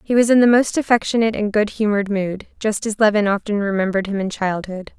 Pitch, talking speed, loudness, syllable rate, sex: 210 Hz, 215 wpm, -18 LUFS, 6.3 syllables/s, female